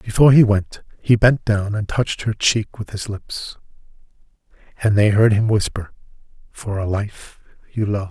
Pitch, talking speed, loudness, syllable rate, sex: 105 Hz, 170 wpm, -18 LUFS, 4.7 syllables/s, male